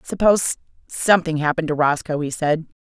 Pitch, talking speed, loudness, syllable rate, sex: 160 Hz, 150 wpm, -19 LUFS, 6.1 syllables/s, female